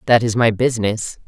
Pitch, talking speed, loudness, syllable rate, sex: 115 Hz, 190 wpm, -17 LUFS, 5.6 syllables/s, female